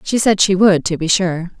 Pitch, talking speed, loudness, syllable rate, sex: 185 Hz, 265 wpm, -14 LUFS, 4.9 syllables/s, female